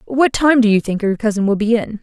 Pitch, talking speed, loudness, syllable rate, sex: 225 Hz, 295 wpm, -15 LUFS, 5.8 syllables/s, female